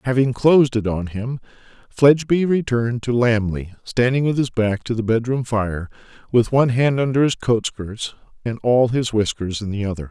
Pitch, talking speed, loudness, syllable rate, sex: 120 Hz, 185 wpm, -19 LUFS, 5.2 syllables/s, male